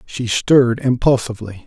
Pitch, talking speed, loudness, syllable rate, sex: 115 Hz, 110 wpm, -16 LUFS, 5.1 syllables/s, male